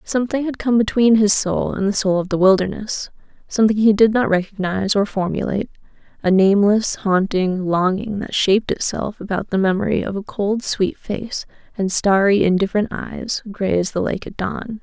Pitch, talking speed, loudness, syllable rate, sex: 200 Hz, 170 wpm, -19 LUFS, 5.2 syllables/s, female